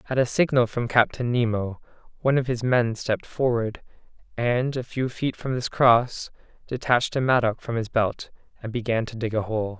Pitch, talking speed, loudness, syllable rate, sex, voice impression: 120 Hz, 190 wpm, -24 LUFS, 5.1 syllables/s, male, very masculine, slightly young, slightly adult-like, slightly thick, slightly tensed, slightly powerful, slightly dark, hard, slightly muffled, fluent, cool, intellectual, refreshing, very sincere, very calm, friendly, slightly reassuring, slightly unique, slightly elegant, slightly wild, sweet, very kind, very modest